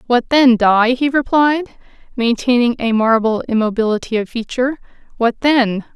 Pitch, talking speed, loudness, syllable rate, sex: 240 Hz, 130 wpm, -15 LUFS, 4.9 syllables/s, female